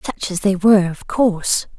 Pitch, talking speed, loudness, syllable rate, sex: 190 Hz, 200 wpm, -17 LUFS, 5.0 syllables/s, female